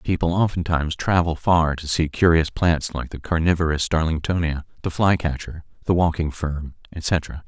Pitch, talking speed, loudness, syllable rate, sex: 80 Hz, 150 wpm, -22 LUFS, 4.9 syllables/s, male